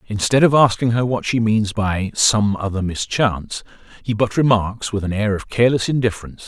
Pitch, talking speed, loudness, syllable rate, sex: 110 Hz, 185 wpm, -18 LUFS, 5.5 syllables/s, male